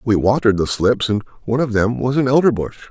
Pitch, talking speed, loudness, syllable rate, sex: 115 Hz, 225 wpm, -17 LUFS, 6.5 syllables/s, male